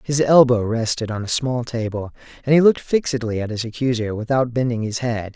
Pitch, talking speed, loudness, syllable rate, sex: 120 Hz, 200 wpm, -20 LUFS, 5.7 syllables/s, male